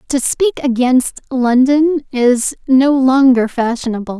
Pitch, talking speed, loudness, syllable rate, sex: 260 Hz, 115 wpm, -14 LUFS, 3.8 syllables/s, female